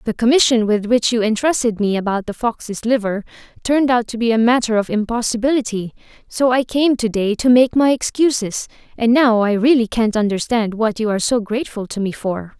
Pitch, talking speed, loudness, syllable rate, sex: 230 Hz, 200 wpm, -17 LUFS, 5.5 syllables/s, female